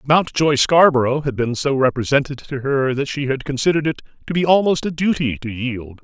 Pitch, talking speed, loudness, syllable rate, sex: 140 Hz, 200 wpm, -18 LUFS, 5.5 syllables/s, male